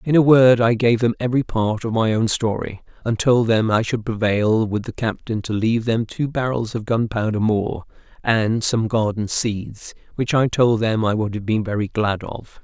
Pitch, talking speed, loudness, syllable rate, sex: 110 Hz, 210 wpm, -20 LUFS, 4.7 syllables/s, male